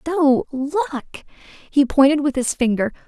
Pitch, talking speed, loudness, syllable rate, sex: 280 Hz, 135 wpm, -19 LUFS, 3.6 syllables/s, female